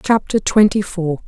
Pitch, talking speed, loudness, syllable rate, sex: 195 Hz, 140 wpm, -16 LUFS, 4.3 syllables/s, female